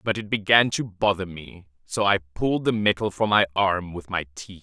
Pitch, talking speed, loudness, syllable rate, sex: 95 Hz, 220 wpm, -23 LUFS, 4.9 syllables/s, male